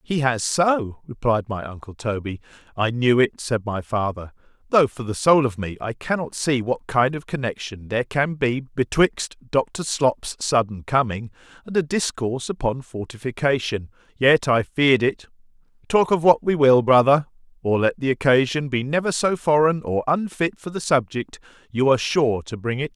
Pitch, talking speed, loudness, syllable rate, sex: 130 Hz, 165 wpm, -21 LUFS, 4.8 syllables/s, male